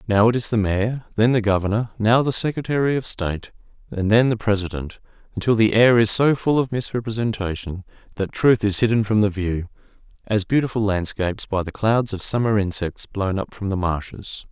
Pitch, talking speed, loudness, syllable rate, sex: 105 Hz, 190 wpm, -20 LUFS, 5.4 syllables/s, male